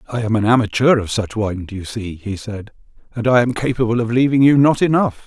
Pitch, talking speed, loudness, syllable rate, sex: 115 Hz, 240 wpm, -17 LUFS, 5.9 syllables/s, male